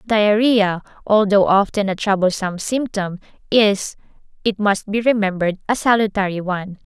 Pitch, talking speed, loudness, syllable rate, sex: 205 Hz, 120 wpm, -18 LUFS, 5.1 syllables/s, female